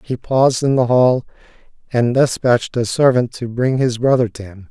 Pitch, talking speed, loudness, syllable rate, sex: 125 Hz, 190 wpm, -16 LUFS, 5.1 syllables/s, male